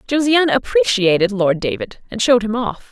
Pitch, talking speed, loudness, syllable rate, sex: 225 Hz, 165 wpm, -16 LUFS, 5.6 syllables/s, female